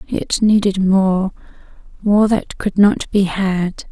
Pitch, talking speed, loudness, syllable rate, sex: 195 Hz, 125 wpm, -16 LUFS, 3.3 syllables/s, female